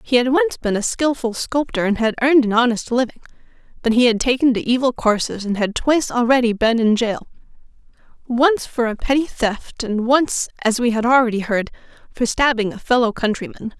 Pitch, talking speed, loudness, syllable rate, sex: 240 Hz, 185 wpm, -18 LUFS, 5.4 syllables/s, female